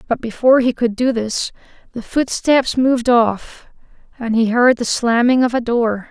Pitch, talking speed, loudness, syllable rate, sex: 240 Hz, 175 wpm, -16 LUFS, 4.6 syllables/s, female